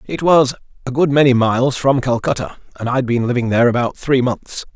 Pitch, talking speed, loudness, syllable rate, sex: 130 Hz, 200 wpm, -16 LUFS, 5.6 syllables/s, male